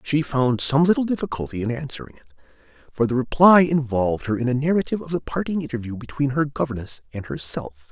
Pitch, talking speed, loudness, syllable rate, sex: 130 Hz, 190 wpm, -22 LUFS, 6.4 syllables/s, male